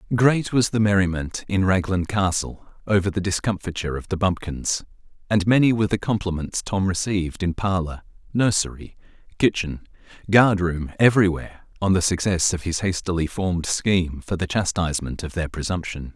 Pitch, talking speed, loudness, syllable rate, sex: 95 Hz, 150 wpm, -22 LUFS, 5.4 syllables/s, male